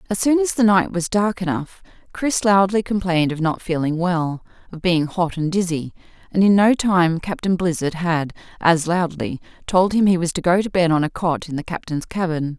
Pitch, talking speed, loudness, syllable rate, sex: 180 Hz, 205 wpm, -19 LUFS, 5.0 syllables/s, female